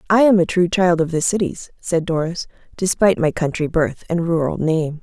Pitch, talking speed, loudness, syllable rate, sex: 170 Hz, 205 wpm, -18 LUFS, 5.2 syllables/s, female